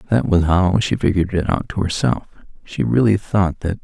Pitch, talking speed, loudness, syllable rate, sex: 95 Hz, 205 wpm, -18 LUFS, 5.2 syllables/s, male